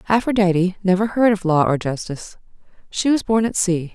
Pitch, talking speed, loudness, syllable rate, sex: 195 Hz, 185 wpm, -19 LUFS, 5.7 syllables/s, female